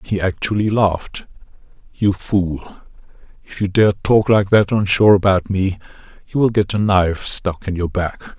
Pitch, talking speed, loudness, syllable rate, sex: 95 Hz, 170 wpm, -17 LUFS, 4.7 syllables/s, male